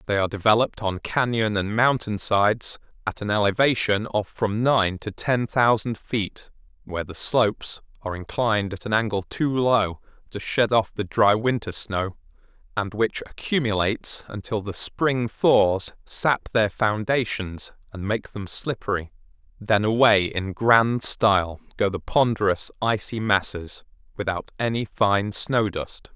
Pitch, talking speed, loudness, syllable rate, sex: 105 Hz, 145 wpm, -23 LUFS, 4.3 syllables/s, male